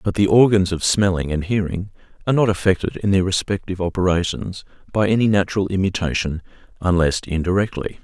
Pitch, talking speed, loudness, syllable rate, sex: 95 Hz, 150 wpm, -19 LUFS, 6.1 syllables/s, male